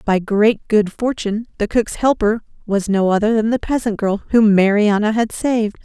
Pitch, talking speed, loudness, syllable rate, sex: 215 Hz, 185 wpm, -17 LUFS, 5.0 syllables/s, female